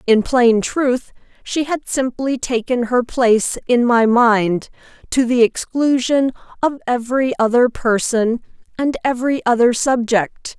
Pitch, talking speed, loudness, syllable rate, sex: 245 Hz, 130 wpm, -17 LUFS, 4.1 syllables/s, female